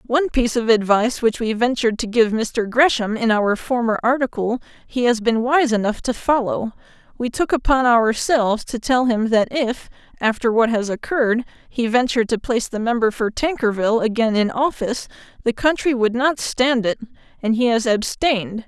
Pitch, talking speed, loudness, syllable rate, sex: 235 Hz, 175 wpm, -19 LUFS, 5.3 syllables/s, female